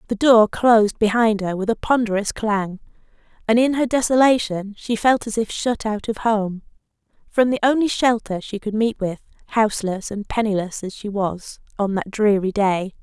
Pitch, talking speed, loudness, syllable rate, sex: 215 Hz, 175 wpm, -20 LUFS, 4.9 syllables/s, female